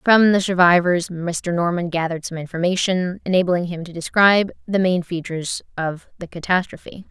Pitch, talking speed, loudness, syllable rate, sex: 175 Hz, 150 wpm, -19 LUFS, 5.3 syllables/s, female